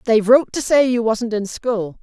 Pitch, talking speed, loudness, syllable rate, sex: 230 Hz, 235 wpm, -17 LUFS, 5.3 syllables/s, female